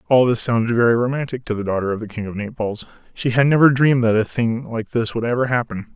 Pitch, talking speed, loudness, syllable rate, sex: 120 Hz, 250 wpm, -19 LUFS, 6.5 syllables/s, male